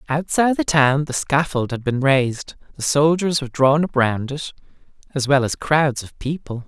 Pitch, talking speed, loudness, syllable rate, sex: 140 Hz, 190 wpm, -19 LUFS, 4.9 syllables/s, male